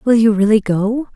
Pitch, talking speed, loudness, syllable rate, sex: 220 Hz, 210 wpm, -14 LUFS, 4.7 syllables/s, female